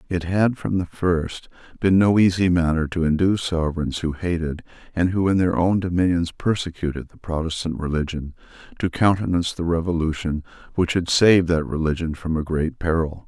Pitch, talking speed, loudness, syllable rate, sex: 85 Hz, 165 wpm, -22 LUFS, 5.4 syllables/s, male